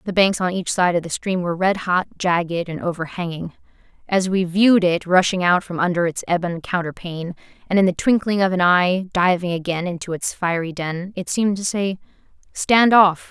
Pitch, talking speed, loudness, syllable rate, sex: 180 Hz, 200 wpm, -19 LUFS, 5.4 syllables/s, female